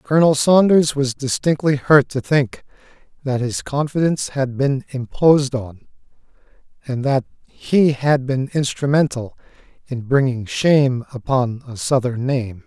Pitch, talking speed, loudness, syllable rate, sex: 135 Hz, 130 wpm, -18 LUFS, 4.4 syllables/s, male